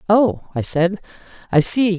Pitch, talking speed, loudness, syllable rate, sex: 195 Hz, 150 wpm, -18 LUFS, 4.2 syllables/s, female